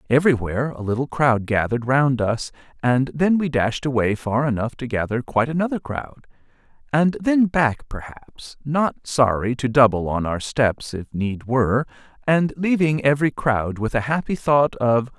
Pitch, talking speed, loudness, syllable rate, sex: 130 Hz, 165 wpm, -21 LUFS, 4.7 syllables/s, male